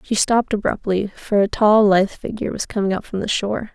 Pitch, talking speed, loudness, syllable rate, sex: 205 Hz, 225 wpm, -19 LUFS, 6.1 syllables/s, female